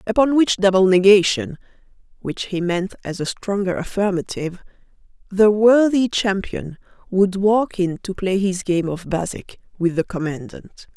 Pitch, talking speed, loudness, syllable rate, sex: 190 Hz, 140 wpm, -19 LUFS, 4.6 syllables/s, female